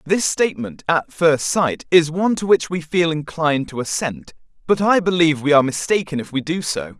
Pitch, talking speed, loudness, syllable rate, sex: 160 Hz, 205 wpm, -19 LUFS, 5.4 syllables/s, male